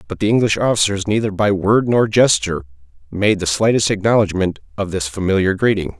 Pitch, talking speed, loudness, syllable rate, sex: 100 Hz, 170 wpm, -17 LUFS, 5.8 syllables/s, male